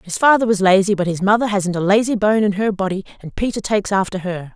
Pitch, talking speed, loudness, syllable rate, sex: 200 Hz, 250 wpm, -17 LUFS, 6.3 syllables/s, female